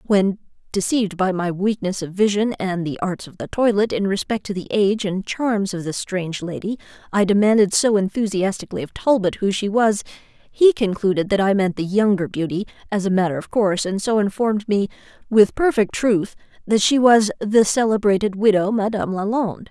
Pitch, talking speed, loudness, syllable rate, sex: 200 Hz, 185 wpm, -20 LUFS, 5.4 syllables/s, female